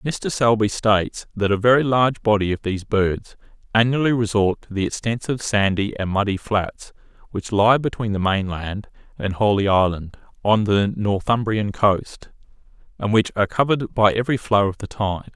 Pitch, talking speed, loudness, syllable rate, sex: 105 Hz, 165 wpm, -20 LUFS, 5.1 syllables/s, male